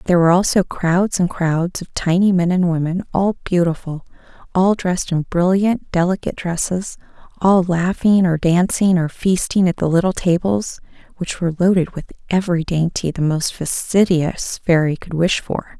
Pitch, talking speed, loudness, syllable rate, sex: 175 Hz, 160 wpm, -18 LUFS, 4.9 syllables/s, female